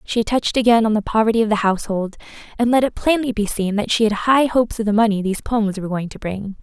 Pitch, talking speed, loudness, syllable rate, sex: 220 Hz, 265 wpm, -18 LUFS, 6.6 syllables/s, female